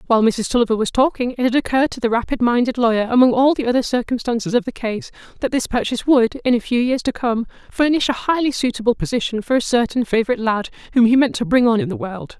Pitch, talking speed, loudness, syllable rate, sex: 240 Hz, 240 wpm, -18 LUFS, 6.7 syllables/s, female